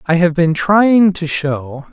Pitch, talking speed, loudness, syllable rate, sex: 170 Hz, 190 wpm, -14 LUFS, 3.4 syllables/s, male